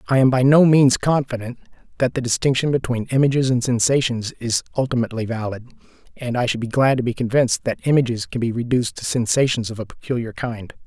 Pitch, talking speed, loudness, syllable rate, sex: 125 Hz, 195 wpm, -20 LUFS, 6.2 syllables/s, male